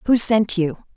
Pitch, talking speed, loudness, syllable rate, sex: 205 Hz, 190 wpm, -18 LUFS, 4.6 syllables/s, female